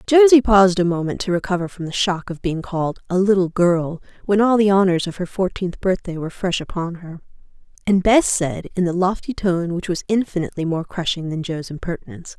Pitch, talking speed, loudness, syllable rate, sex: 185 Hz, 205 wpm, -19 LUFS, 5.8 syllables/s, female